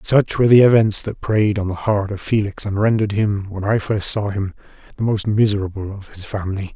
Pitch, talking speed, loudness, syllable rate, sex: 105 Hz, 220 wpm, -18 LUFS, 5.7 syllables/s, male